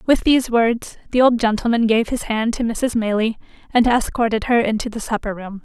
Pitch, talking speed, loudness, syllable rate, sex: 230 Hz, 200 wpm, -19 LUFS, 5.4 syllables/s, female